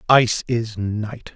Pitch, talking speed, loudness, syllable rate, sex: 110 Hz, 135 wpm, -21 LUFS, 3.7 syllables/s, male